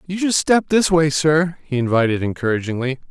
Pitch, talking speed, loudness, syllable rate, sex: 145 Hz, 175 wpm, -18 LUFS, 5.4 syllables/s, male